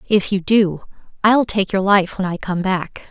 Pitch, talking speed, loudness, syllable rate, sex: 195 Hz, 210 wpm, -18 LUFS, 4.3 syllables/s, female